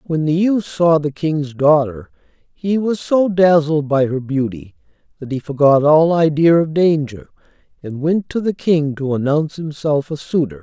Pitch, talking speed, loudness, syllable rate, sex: 155 Hz, 175 wpm, -16 LUFS, 4.4 syllables/s, male